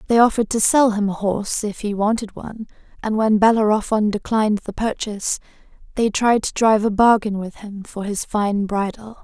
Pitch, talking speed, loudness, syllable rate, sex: 210 Hz, 190 wpm, -19 LUFS, 5.5 syllables/s, female